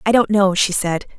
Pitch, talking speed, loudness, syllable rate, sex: 195 Hz, 255 wpm, -17 LUFS, 5.1 syllables/s, female